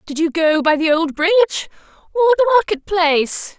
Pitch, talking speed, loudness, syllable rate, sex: 350 Hz, 185 wpm, -16 LUFS, 6.5 syllables/s, female